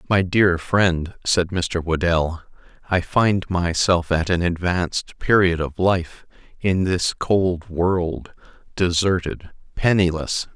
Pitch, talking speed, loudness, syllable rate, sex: 90 Hz, 120 wpm, -20 LUFS, 3.4 syllables/s, male